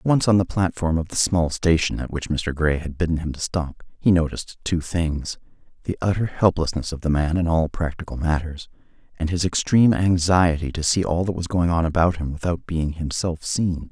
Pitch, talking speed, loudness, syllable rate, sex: 85 Hz, 205 wpm, -22 LUFS, 5.2 syllables/s, male